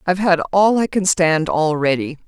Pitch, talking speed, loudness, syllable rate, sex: 170 Hz, 185 wpm, -17 LUFS, 4.8 syllables/s, female